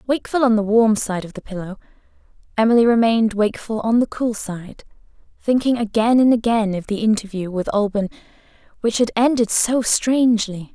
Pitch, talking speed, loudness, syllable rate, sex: 220 Hz, 155 wpm, -19 LUFS, 5.5 syllables/s, female